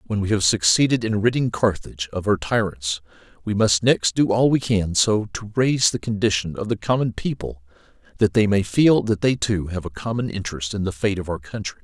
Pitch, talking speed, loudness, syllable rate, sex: 100 Hz, 220 wpm, -21 LUFS, 5.4 syllables/s, male